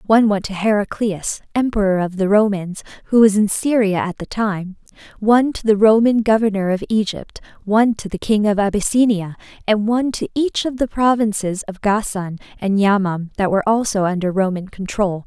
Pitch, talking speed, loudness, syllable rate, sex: 205 Hz, 175 wpm, -18 LUFS, 5.4 syllables/s, female